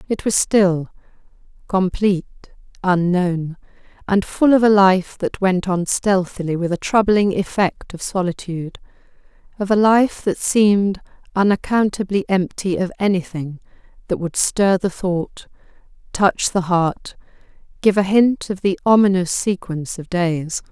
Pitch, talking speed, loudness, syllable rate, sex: 190 Hz, 135 wpm, -18 LUFS, 4.3 syllables/s, female